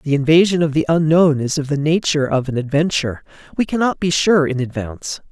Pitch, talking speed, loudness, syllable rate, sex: 150 Hz, 205 wpm, -17 LUFS, 6.0 syllables/s, male